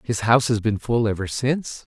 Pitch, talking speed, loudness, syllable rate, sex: 115 Hz, 215 wpm, -21 LUFS, 5.6 syllables/s, male